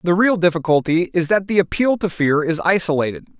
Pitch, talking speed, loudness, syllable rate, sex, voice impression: 175 Hz, 195 wpm, -18 LUFS, 5.7 syllables/s, male, masculine, adult-like, slightly fluent, sincere, slightly friendly, slightly lively